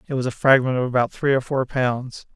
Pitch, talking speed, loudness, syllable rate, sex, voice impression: 130 Hz, 255 wpm, -21 LUFS, 5.7 syllables/s, male, masculine, slightly middle-aged, thick, relaxed, slightly weak, dark, slightly soft, slightly muffled, fluent, slightly cool, intellectual, refreshing, very sincere, calm, mature, friendly, reassuring, slightly unique, slightly elegant, slightly wild, slightly sweet, slightly lively, kind, very modest, light